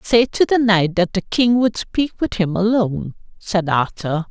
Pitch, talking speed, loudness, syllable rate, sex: 200 Hz, 195 wpm, -18 LUFS, 4.3 syllables/s, female